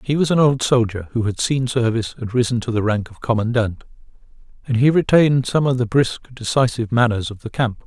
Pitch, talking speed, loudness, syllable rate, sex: 120 Hz, 215 wpm, -19 LUFS, 5.9 syllables/s, male